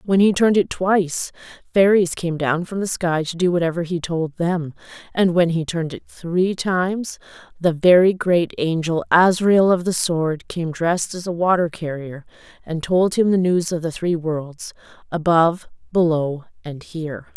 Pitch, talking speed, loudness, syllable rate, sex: 170 Hz, 170 wpm, -19 LUFS, 4.6 syllables/s, female